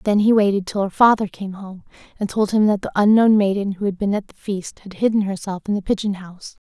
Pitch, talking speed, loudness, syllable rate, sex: 200 Hz, 250 wpm, -19 LUFS, 6.0 syllables/s, female